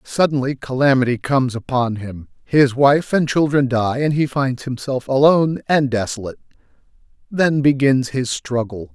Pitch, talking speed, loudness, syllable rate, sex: 130 Hz, 140 wpm, -18 LUFS, 4.8 syllables/s, male